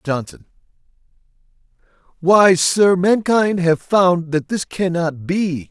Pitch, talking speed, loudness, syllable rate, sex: 175 Hz, 105 wpm, -16 LUFS, 3.4 syllables/s, male